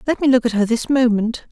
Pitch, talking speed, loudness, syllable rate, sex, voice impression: 245 Hz, 275 wpm, -17 LUFS, 5.8 syllables/s, female, feminine, middle-aged, relaxed, slightly weak, slightly dark, muffled, slightly raspy, slightly intellectual, calm, slightly kind, modest